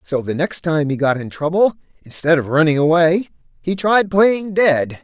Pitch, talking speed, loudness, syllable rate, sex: 165 Hz, 190 wpm, -17 LUFS, 4.7 syllables/s, male